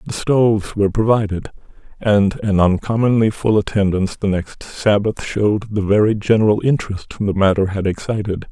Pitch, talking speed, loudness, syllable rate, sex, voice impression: 105 Hz, 150 wpm, -17 LUFS, 5.3 syllables/s, male, very masculine, old, very thick, slightly tensed, very powerful, very dark, soft, very muffled, halting, raspy, very cool, intellectual, slightly refreshing, sincere, very calm, very mature, friendly, reassuring, very unique, slightly elegant, very wild, sweet, slightly lively, very kind, very modest